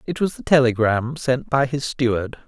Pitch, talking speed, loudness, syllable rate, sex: 130 Hz, 195 wpm, -20 LUFS, 4.8 syllables/s, male